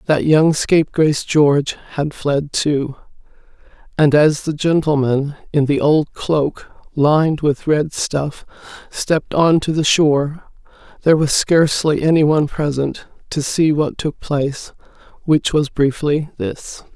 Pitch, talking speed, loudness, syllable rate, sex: 150 Hz, 140 wpm, -17 LUFS, 4.1 syllables/s, female